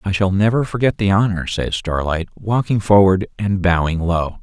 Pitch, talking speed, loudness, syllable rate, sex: 95 Hz, 175 wpm, -17 LUFS, 4.8 syllables/s, male